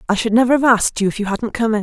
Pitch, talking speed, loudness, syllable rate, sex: 220 Hz, 360 wpm, -16 LUFS, 7.7 syllables/s, female